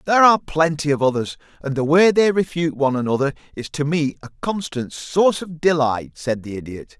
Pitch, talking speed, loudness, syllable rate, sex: 150 Hz, 195 wpm, -19 LUFS, 5.8 syllables/s, male